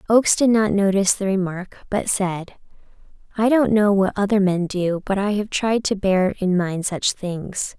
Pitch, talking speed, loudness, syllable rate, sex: 195 Hz, 195 wpm, -20 LUFS, 4.6 syllables/s, female